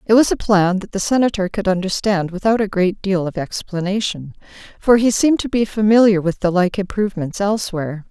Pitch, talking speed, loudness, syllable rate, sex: 195 Hz, 190 wpm, -18 LUFS, 5.7 syllables/s, female